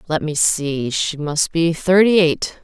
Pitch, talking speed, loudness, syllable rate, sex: 160 Hz, 160 wpm, -17 LUFS, 3.6 syllables/s, female